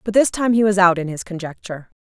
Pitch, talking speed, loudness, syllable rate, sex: 195 Hz, 265 wpm, -18 LUFS, 6.5 syllables/s, female